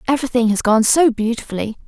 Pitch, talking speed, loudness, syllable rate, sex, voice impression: 240 Hz, 160 wpm, -16 LUFS, 6.7 syllables/s, female, very feminine, young, very thin, very tensed, powerful, very bright, hard, very clear, very fluent, very cute, slightly cool, intellectual, very refreshing, sincere, slightly calm, very friendly, very reassuring, unique, elegant, slightly wild, very sweet, very lively, intense, slightly sharp